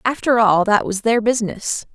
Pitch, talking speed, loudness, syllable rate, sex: 225 Hz, 185 wpm, -17 LUFS, 5.0 syllables/s, female